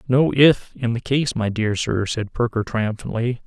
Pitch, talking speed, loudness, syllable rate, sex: 120 Hz, 190 wpm, -20 LUFS, 4.3 syllables/s, male